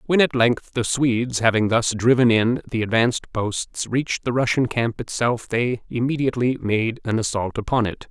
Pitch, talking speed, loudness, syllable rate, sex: 120 Hz, 180 wpm, -21 LUFS, 5.0 syllables/s, male